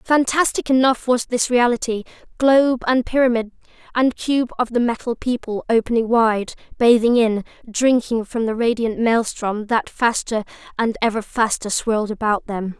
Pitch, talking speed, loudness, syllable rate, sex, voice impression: 235 Hz, 140 wpm, -19 LUFS, 4.7 syllables/s, female, very feminine, very gender-neutral, very young, thin, very tensed, powerful, bright, very hard, very clear, fluent, very cute, intellectual, very refreshing, very sincere, slightly calm, very friendly, reassuring, very unique, elegant, very sweet, lively, strict, sharp